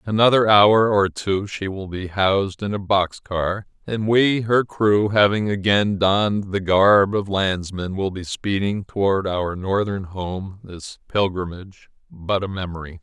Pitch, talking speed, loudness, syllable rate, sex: 100 Hz, 165 wpm, -20 LUFS, 4.2 syllables/s, male